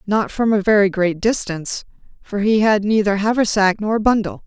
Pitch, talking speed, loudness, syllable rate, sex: 205 Hz, 175 wpm, -17 LUFS, 5.0 syllables/s, female